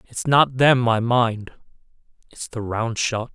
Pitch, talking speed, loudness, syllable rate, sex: 120 Hz, 160 wpm, -20 LUFS, 3.7 syllables/s, male